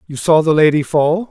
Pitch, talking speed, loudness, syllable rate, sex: 160 Hz, 230 wpm, -14 LUFS, 5.2 syllables/s, male